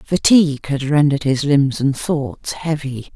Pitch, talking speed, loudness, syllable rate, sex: 145 Hz, 150 wpm, -17 LUFS, 4.3 syllables/s, female